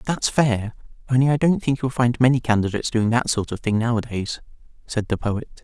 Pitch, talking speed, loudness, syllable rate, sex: 120 Hz, 200 wpm, -21 LUFS, 5.5 syllables/s, male